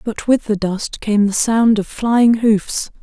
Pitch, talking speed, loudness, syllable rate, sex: 215 Hz, 200 wpm, -16 LUFS, 3.5 syllables/s, female